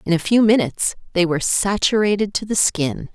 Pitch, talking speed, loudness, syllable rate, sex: 190 Hz, 190 wpm, -18 LUFS, 5.6 syllables/s, female